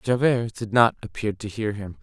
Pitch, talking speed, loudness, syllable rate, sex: 110 Hz, 210 wpm, -23 LUFS, 4.9 syllables/s, male